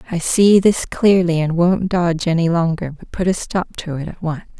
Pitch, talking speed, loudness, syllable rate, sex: 175 Hz, 220 wpm, -17 LUFS, 4.9 syllables/s, female